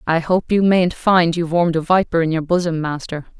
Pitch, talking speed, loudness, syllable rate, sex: 170 Hz, 230 wpm, -17 LUFS, 5.7 syllables/s, female